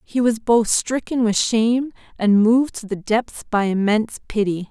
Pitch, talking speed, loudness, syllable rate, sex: 225 Hz, 180 wpm, -19 LUFS, 4.7 syllables/s, female